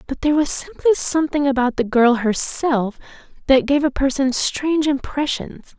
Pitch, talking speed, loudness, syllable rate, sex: 275 Hz, 155 wpm, -18 LUFS, 5.0 syllables/s, female